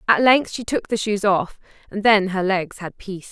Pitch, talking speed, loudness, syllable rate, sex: 205 Hz, 235 wpm, -19 LUFS, 4.9 syllables/s, female